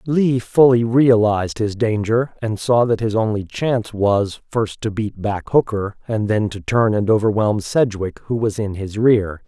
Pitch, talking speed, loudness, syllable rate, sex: 110 Hz, 185 wpm, -18 LUFS, 4.3 syllables/s, male